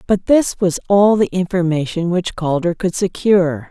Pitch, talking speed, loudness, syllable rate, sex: 180 Hz, 160 wpm, -16 LUFS, 4.6 syllables/s, female